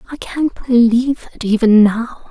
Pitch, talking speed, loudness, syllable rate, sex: 240 Hz, 155 wpm, -14 LUFS, 4.6 syllables/s, female